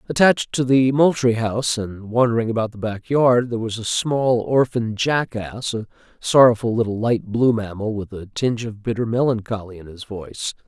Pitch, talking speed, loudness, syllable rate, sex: 115 Hz, 180 wpm, -20 LUFS, 5.2 syllables/s, male